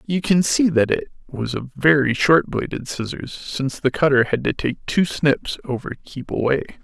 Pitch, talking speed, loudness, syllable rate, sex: 140 Hz, 195 wpm, -20 LUFS, 4.7 syllables/s, male